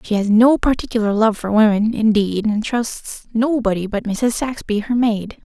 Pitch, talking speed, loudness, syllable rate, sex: 220 Hz, 175 wpm, -18 LUFS, 4.6 syllables/s, female